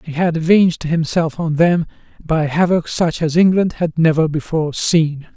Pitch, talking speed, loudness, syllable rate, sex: 160 Hz, 170 wpm, -16 LUFS, 4.7 syllables/s, male